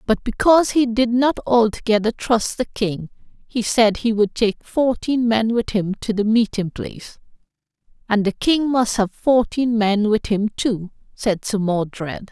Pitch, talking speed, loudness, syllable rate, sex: 220 Hz, 170 wpm, -19 LUFS, 4.2 syllables/s, female